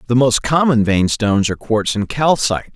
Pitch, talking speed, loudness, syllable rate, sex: 120 Hz, 195 wpm, -16 LUFS, 5.5 syllables/s, male